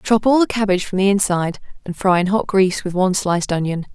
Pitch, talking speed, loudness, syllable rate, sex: 190 Hz, 245 wpm, -18 LUFS, 6.6 syllables/s, female